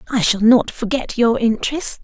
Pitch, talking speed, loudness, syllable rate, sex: 230 Hz, 175 wpm, -17 LUFS, 5.1 syllables/s, female